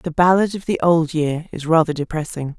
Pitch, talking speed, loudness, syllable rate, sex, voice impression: 165 Hz, 210 wpm, -19 LUFS, 5.2 syllables/s, female, very feminine, very adult-like, slightly middle-aged, slightly thin, slightly tensed, slightly weak, slightly dark, soft, slightly clear, slightly fluent, cute, slightly cool, intellectual, slightly refreshing, sincere, very calm, friendly, slightly reassuring, unique, elegant, slightly wild, sweet, slightly lively, very kind, slightly modest